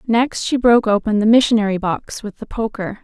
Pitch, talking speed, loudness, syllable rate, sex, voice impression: 220 Hz, 200 wpm, -16 LUFS, 5.6 syllables/s, female, very feminine, slightly young, slightly adult-like, thin, slightly tensed, slightly weak, slightly bright, slightly hard, clear, slightly fluent, cute, intellectual, refreshing, sincere, very calm, friendly, reassuring, elegant, slightly wild, slightly sweet, kind, modest